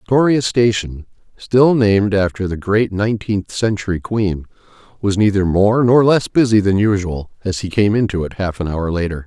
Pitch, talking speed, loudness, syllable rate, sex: 100 Hz, 175 wpm, -16 LUFS, 5.1 syllables/s, male